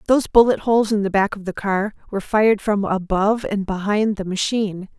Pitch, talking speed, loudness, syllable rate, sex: 205 Hz, 205 wpm, -19 LUFS, 5.9 syllables/s, female